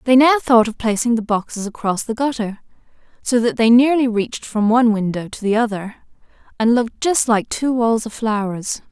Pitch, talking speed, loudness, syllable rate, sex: 230 Hz, 195 wpm, -18 LUFS, 5.3 syllables/s, female